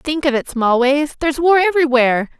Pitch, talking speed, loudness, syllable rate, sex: 285 Hz, 175 wpm, -15 LUFS, 6.0 syllables/s, female